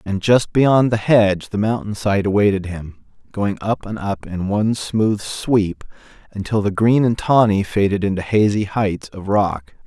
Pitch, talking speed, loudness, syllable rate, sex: 105 Hz, 170 wpm, -18 LUFS, 4.5 syllables/s, male